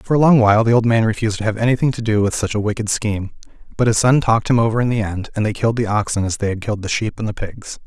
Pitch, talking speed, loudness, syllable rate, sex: 110 Hz, 315 wpm, -18 LUFS, 7.3 syllables/s, male